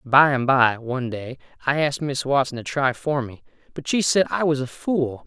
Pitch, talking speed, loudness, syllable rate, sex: 135 Hz, 230 wpm, -22 LUFS, 5.1 syllables/s, male